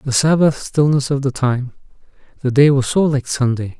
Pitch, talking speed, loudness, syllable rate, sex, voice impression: 135 Hz, 190 wpm, -16 LUFS, 4.9 syllables/s, male, masculine, adult-like, slightly relaxed, weak, soft, fluent, slightly raspy, intellectual, calm, friendly, reassuring, kind, modest